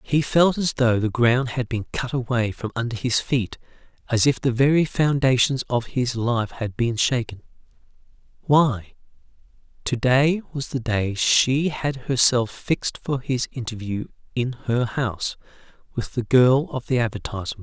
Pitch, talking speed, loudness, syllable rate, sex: 125 Hz, 160 wpm, -22 LUFS, 4.5 syllables/s, male